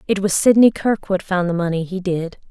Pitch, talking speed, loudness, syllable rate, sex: 190 Hz, 190 wpm, -18 LUFS, 5.3 syllables/s, female